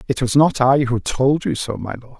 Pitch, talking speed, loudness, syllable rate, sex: 130 Hz, 275 wpm, -18 LUFS, 5.2 syllables/s, male